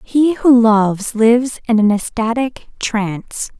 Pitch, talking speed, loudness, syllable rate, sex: 230 Hz, 135 wpm, -15 LUFS, 3.9 syllables/s, female